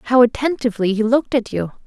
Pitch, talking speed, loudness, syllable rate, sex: 240 Hz, 195 wpm, -18 LUFS, 6.2 syllables/s, female